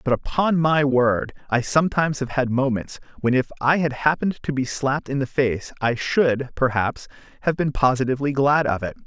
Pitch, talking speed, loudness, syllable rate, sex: 135 Hz, 190 wpm, -21 LUFS, 5.4 syllables/s, male